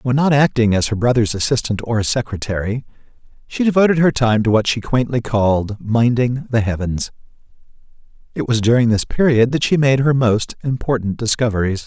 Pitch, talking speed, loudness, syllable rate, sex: 120 Hz, 165 wpm, -17 LUFS, 5.4 syllables/s, male